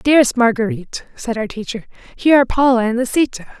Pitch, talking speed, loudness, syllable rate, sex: 245 Hz, 165 wpm, -17 LUFS, 6.6 syllables/s, female